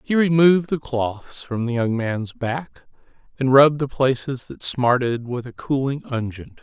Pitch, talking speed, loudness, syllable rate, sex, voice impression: 130 Hz, 170 wpm, -21 LUFS, 4.4 syllables/s, male, very masculine, very adult-like, slightly thick, cool, intellectual, slightly calm, slightly elegant